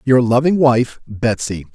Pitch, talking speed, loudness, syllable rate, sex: 120 Hz, 140 wpm, -16 LUFS, 4.0 syllables/s, male